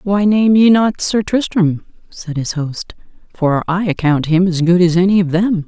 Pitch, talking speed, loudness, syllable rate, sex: 180 Hz, 200 wpm, -14 LUFS, 4.5 syllables/s, female